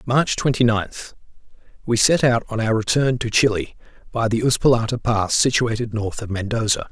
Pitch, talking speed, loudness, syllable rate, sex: 115 Hz, 155 wpm, -20 LUFS, 5.1 syllables/s, male